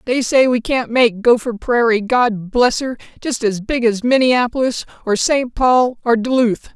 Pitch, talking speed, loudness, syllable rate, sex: 240 Hz, 180 wpm, -16 LUFS, 4.3 syllables/s, female